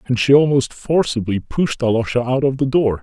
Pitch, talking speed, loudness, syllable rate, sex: 125 Hz, 200 wpm, -17 LUFS, 5.2 syllables/s, male